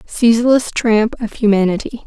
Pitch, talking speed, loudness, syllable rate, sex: 225 Hz, 115 wpm, -15 LUFS, 4.9 syllables/s, female